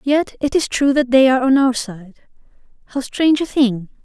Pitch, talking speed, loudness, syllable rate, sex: 260 Hz, 210 wpm, -16 LUFS, 5.4 syllables/s, female